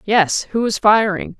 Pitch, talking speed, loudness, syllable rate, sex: 205 Hz, 175 wpm, -16 LUFS, 4.1 syllables/s, female